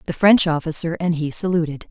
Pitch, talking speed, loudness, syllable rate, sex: 165 Hz, 190 wpm, -19 LUFS, 5.7 syllables/s, female